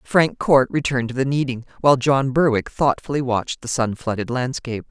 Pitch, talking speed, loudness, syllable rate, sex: 130 Hz, 185 wpm, -20 LUFS, 5.8 syllables/s, female